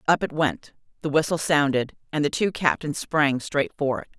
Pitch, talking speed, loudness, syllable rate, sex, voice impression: 145 Hz, 200 wpm, -24 LUFS, 4.9 syllables/s, female, slightly gender-neutral, slightly middle-aged, tensed, clear, calm, elegant